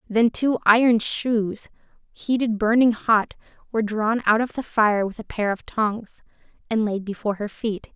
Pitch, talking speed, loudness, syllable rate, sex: 220 Hz, 175 wpm, -22 LUFS, 4.6 syllables/s, female